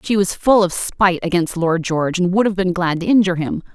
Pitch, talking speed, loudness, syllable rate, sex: 180 Hz, 255 wpm, -17 LUFS, 5.9 syllables/s, female